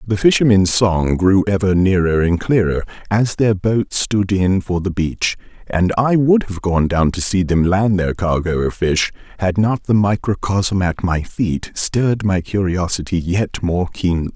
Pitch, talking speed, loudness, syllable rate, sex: 95 Hz, 180 wpm, -17 LUFS, 4.2 syllables/s, male